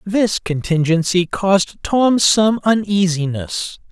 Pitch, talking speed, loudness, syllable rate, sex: 185 Hz, 90 wpm, -16 LUFS, 3.6 syllables/s, male